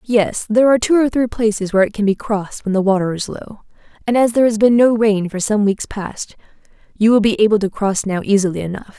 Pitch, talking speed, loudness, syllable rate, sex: 215 Hz, 245 wpm, -16 LUFS, 6.1 syllables/s, female